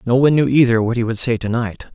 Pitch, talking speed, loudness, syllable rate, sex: 120 Hz, 310 wpm, -17 LUFS, 6.8 syllables/s, male